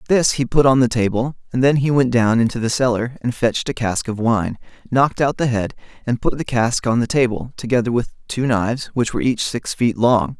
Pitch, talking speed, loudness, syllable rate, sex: 120 Hz, 235 wpm, -19 LUFS, 5.6 syllables/s, male